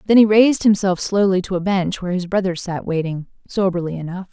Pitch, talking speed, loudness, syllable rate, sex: 185 Hz, 210 wpm, -18 LUFS, 6.1 syllables/s, female